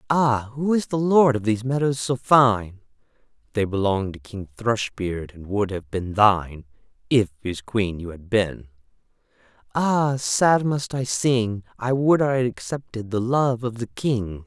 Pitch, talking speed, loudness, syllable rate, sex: 115 Hz, 165 wpm, -22 LUFS, 4.0 syllables/s, male